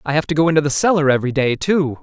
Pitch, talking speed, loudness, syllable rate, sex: 150 Hz, 295 wpm, -17 LUFS, 7.3 syllables/s, male